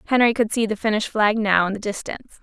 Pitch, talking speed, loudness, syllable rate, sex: 215 Hz, 250 wpm, -20 LUFS, 6.3 syllables/s, female